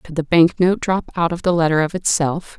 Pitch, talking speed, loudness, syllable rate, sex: 170 Hz, 255 wpm, -18 LUFS, 5.2 syllables/s, female